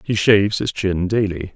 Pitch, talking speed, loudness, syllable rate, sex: 100 Hz, 195 wpm, -18 LUFS, 4.8 syllables/s, male